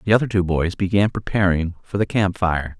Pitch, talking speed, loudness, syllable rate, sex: 95 Hz, 215 wpm, -20 LUFS, 5.4 syllables/s, male